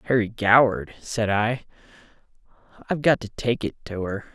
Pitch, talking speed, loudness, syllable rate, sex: 115 Hz, 150 wpm, -23 LUFS, 5.2 syllables/s, male